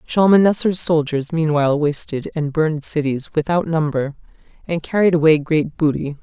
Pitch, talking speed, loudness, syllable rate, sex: 155 Hz, 135 wpm, -18 LUFS, 5.0 syllables/s, female